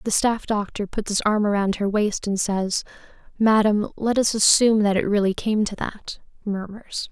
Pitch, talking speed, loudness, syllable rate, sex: 210 Hz, 185 wpm, -21 LUFS, 5.1 syllables/s, female